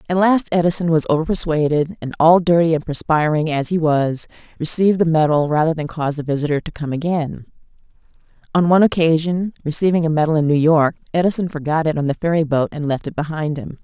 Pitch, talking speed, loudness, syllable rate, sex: 160 Hz, 195 wpm, -18 LUFS, 6.2 syllables/s, female